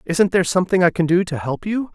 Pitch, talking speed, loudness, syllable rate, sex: 180 Hz, 275 wpm, -18 LUFS, 6.5 syllables/s, male